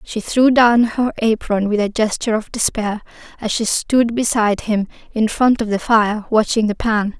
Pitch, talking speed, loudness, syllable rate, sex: 220 Hz, 190 wpm, -17 LUFS, 4.7 syllables/s, female